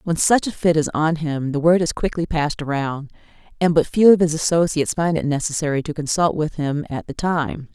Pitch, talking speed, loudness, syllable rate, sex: 160 Hz, 225 wpm, -20 LUFS, 5.5 syllables/s, female